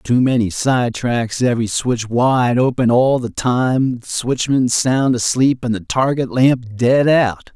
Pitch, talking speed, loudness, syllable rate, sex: 125 Hz, 160 wpm, -16 LUFS, 3.7 syllables/s, male